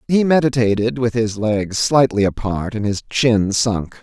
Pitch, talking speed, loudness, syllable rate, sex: 115 Hz, 165 wpm, -17 LUFS, 4.2 syllables/s, male